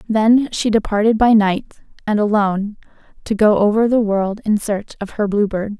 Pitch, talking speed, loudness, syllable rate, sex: 210 Hz, 185 wpm, -17 LUFS, 4.8 syllables/s, female